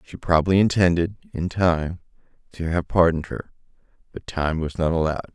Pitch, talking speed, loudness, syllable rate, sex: 85 Hz, 155 wpm, -22 LUFS, 5.8 syllables/s, male